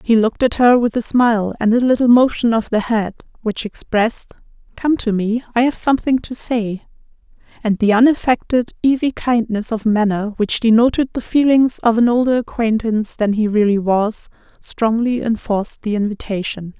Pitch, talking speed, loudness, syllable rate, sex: 225 Hz, 170 wpm, -17 LUFS, 5.1 syllables/s, female